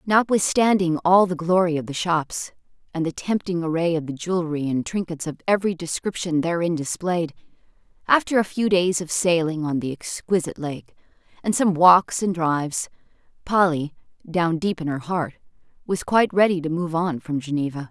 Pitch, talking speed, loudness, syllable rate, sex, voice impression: 170 Hz, 170 wpm, -22 LUFS, 5.2 syllables/s, female, very feminine, very adult-like, thin, tensed, slightly powerful, bright, slightly soft, very clear, very fluent, slightly raspy, cute, intellectual, very refreshing, sincere, calm, very friendly, very reassuring, elegant, wild, very sweet, very lively, strict, intense, sharp, light